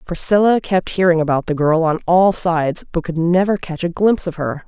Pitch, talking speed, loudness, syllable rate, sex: 175 Hz, 220 wpm, -17 LUFS, 5.5 syllables/s, female